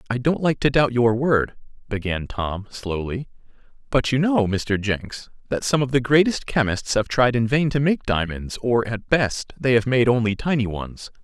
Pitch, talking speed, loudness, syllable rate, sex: 120 Hz, 200 wpm, -21 LUFS, 4.5 syllables/s, male